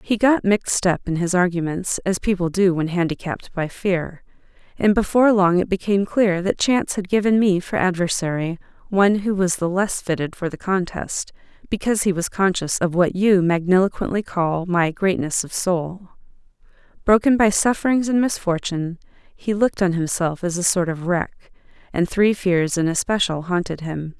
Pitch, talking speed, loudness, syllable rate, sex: 185 Hz, 175 wpm, -20 LUFS, 5.1 syllables/s, female